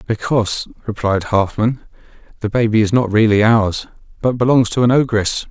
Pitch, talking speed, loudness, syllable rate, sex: 110 Hz, 155 wpm, -16 LUFS, 5.1 syllables/s, male